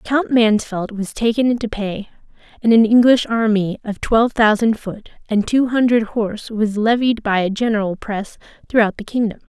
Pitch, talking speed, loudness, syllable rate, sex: 220 Hz, 170 wpm, -17 LUFS, 4.9 syllables/s, female